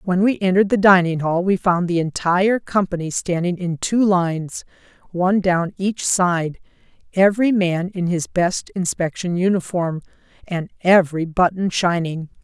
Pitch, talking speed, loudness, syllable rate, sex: 180 Hz, 145 wpm, -19 LUFS, 4.7 syllables/s, female